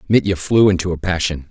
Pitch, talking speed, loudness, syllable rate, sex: 90 Hz, 200 wpm, -17 LUFS, 5.9 syllables/s, male